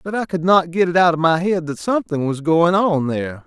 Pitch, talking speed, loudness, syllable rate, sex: 170 Hz, 275 wpm, -18 LUFS, 5.6 syllables/s, male